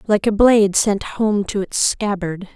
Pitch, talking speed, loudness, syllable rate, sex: 205 Hz, 190 wpm, -17 LUFS, 4.3 syllables/s, female